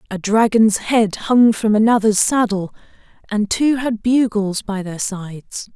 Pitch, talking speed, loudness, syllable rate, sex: 215 Hz, 145 wpm, -17 LUFS, 4.1 syllables/s, female